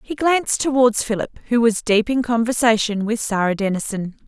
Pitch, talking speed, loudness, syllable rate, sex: 230 Hz, 170 wpm, -19 LUFS, 5.3 syllables/s, female